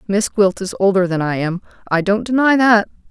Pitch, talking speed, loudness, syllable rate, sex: 200 Hz, 195 wpm, -16 LUFS, 5.2 syllables/s, female